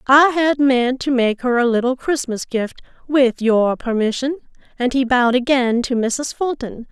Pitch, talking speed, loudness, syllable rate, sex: 255 Hz, 175 wpm, -18 LUFS, 4.4 syllables/s, female